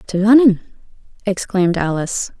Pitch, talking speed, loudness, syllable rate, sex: 190 Hz, 100 wpm, -16 LUFS, 5.3 syllables/s, female